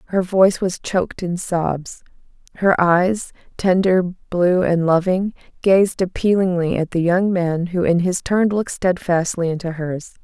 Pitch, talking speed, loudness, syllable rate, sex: 180 Hz, 150 wpm, -19 LUFS, 4.2 syllables/s, female